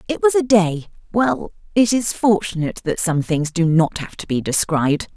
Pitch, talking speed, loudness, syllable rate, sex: 190 Hz, 185 wpm, -19 LUFS, 5.0 syllables/s, female